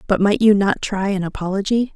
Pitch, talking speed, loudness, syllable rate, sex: 200 Hz, 215 wpm, -18 LUFS, 5.6 syllables/s, female